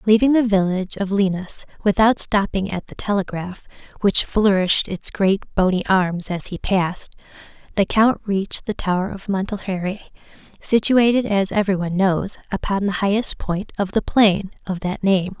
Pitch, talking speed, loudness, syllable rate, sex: 195 Hz, 160 wpm, -20 LUFS, 4.8 syllables/s, female